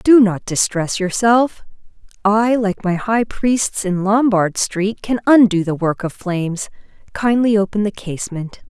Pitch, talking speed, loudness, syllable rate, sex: 205 Hz, 150 wpm, -17 LUFS, 4.1 syllables/s, female